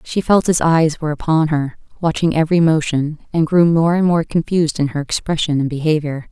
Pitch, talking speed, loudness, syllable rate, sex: 160 Hz, 200 wpm, -16 LUFS, 5.6 syllables/s, female